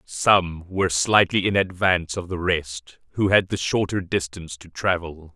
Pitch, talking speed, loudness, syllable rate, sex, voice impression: 90 Hz, 170 wpm, -22 LUFS, 4.5 syllables/s, male, masculine, adult-like, tensed, powerful, clear, nasal, slightly intellectual, slightly mature, slightly friendly, unique, wild, lively, slightly sharp